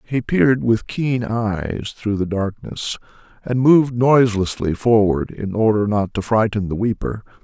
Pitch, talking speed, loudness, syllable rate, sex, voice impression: 110 Hz, 155 wpm, -19 LUFS, 4.4 syllables/s, male, masculine, very adult-like, slightly thick, slightly muffled, cool, calm, wild